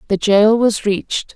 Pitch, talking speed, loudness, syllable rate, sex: 210 Hz, 175 wpm, -15 LUFS, 4.4 syllables/s, female